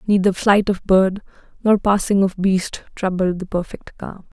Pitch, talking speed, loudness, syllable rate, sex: 195 Hz, 165 wpm, -18 LUFS, 4.5 syllables/s, female